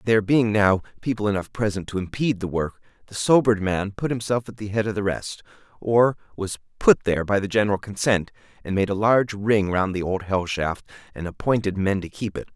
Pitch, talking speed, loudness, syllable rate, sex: 105 Hz, 215 wpm, -23 LUFS, 5.8 syllables/s, male